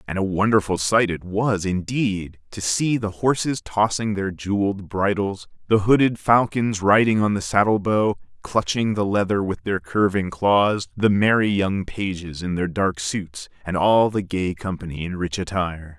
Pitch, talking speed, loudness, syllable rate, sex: 100 Hz, 170 wpm, -21 LUFS, 4.5 syllables/s, male